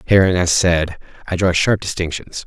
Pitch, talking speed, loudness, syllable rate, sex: 90 Hz, 170 wpm, -17 LUFS, 5.0 syllables/s, male